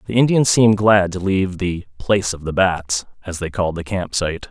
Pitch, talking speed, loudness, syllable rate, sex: 95 Hz, 225 wpm, -18 LUFS, 5.5 syllables/s, male